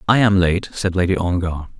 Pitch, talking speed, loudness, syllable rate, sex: 90 Hz, 200 wpm, -18 LUFS, 5.3 syllables/s, male